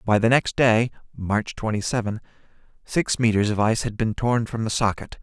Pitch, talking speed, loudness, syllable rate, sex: 110 Hz, 195 wpm, -22 LUFS, 5.2 syllables/s, male